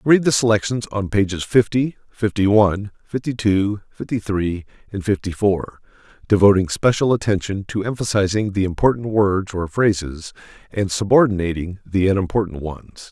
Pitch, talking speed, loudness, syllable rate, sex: 100 Hz, 135 wpm, -19 LUFS, 4.9 syllables/s, male